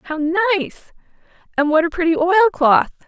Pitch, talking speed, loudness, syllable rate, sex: 340 Hz, 155 wpm, -16 LUFS, 4.3 syllables/s, female